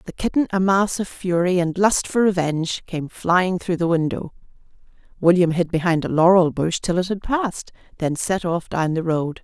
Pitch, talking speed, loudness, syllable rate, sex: 175 Hz, 195 wpm, -20 LUFS, 4.9 syllables/s, female